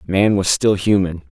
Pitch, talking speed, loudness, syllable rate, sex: 95 Hz, 175 wpm, -17 LUFS, 4.5 syllables/s, male